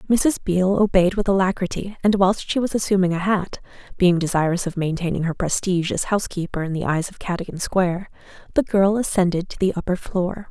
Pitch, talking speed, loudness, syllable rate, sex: 185 Hz, 185 wpm, -21 LUFS, 5.9 syllables/s, female